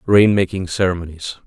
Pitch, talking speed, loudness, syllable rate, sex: 90 Hz, 125 wpm, -18 LUFS, 5.6 syllables/s, male